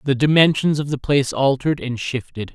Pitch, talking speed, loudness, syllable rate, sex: 135 Hz, 190 wpm, -19 LUFS, 5.8 syllables/s, male